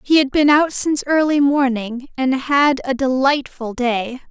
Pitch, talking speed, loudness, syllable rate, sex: 270 Hz, 165 wpm, -17 LUFS, 4.3 syllables/s, female